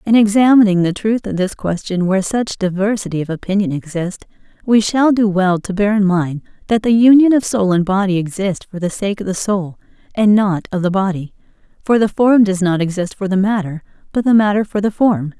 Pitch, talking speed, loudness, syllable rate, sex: 200 Hz, 215 wpm, -15 LUFS, 5.5 syllables/s, female